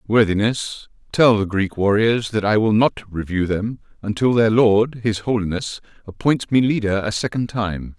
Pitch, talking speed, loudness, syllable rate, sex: 105 Hz, 165 wpm, -19 LUFS, 4.5 syllables/s, male